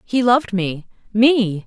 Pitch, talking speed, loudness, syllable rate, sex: 220 Hz, 110 wpm, -17 LUFS, 3.8 syllables/s, female